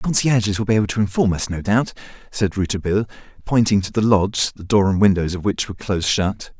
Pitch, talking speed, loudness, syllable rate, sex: 100 Hz, 230 wpm, -19 LUFS, 6.6 syllables/s, male